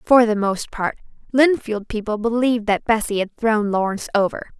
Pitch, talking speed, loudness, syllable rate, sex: 220 Hz, 170 wpm, -20 LUFS, 5.3 syllables/s, female